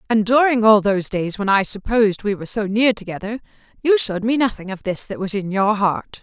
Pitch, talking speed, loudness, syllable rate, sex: 215 Hz, 220 wpm, -19 LUFS, 5.9 syllables/s, female